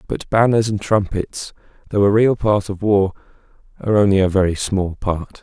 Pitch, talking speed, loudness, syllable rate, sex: 100 Hz, 175 wpm, -18 LUFS, 5.0 syllables/s, male